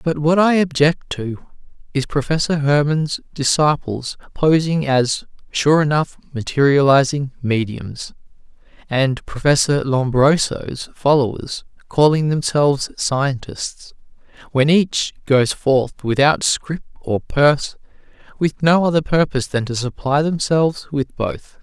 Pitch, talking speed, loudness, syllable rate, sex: 145 Hz, 110 wpm, -18 LUFS, 4.0 syllables/s, male